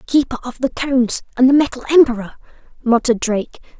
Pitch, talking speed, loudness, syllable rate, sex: 250 Hz, 175 wpm, -16 LUFS, 7.3 syllables/s, female